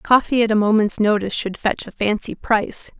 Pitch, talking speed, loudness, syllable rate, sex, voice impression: 215 Hz, 200 wpm, -19 LUFS, 5.5 syllables/s, female, very feminine, adult-like, thin, tensed, slightly powerful, bright, slightly soft, clear, very fluent, slightly raspy, cool, intellectual, very refreshing, sincere, calm, friendly, reassuring, unique, slightly elegant, wild, very sweet, lively, kind, slightly modest, light